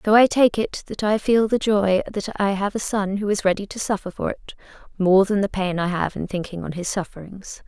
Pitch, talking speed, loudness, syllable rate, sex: 200 Hz, 250 wpm, -21 LUFS, 5.2 syllables/s, female